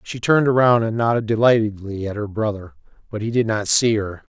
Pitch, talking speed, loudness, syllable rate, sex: 110 Hz, 205 wpm, -19 LUFS, 5.8 syllables/s, male